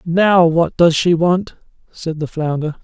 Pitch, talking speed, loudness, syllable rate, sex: 165 Hz, 170 wpm, -15 LUFS, 3.8 syllables/s, male